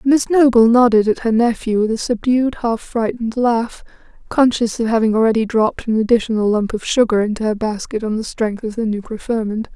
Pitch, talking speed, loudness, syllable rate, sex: 225 Hz, 195 wpm, -17 LUFS, 5.6 syllables/s, female